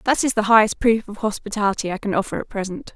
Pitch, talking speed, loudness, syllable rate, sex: 210 Hz, 245 wpm, -20 LUFS, 6.7 syllables/s, female